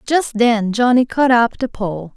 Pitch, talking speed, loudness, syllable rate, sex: 235 Hz, 195 wpm, -16 LUFS, 4.0 syllables/s, female